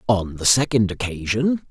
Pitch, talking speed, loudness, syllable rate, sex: 115 Hz, 140 wpm, -20 LUFS, 4.8 syllables/s, male